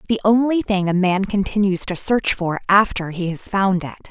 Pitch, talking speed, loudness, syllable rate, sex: 195 Hz, 205 wpm, -19 LUFS, 5.0 syllables/s, female